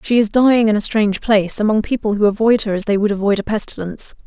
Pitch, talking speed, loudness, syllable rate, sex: 210 Hz, 255 wpm, -16 LUFS, 6.9 syllables/s, female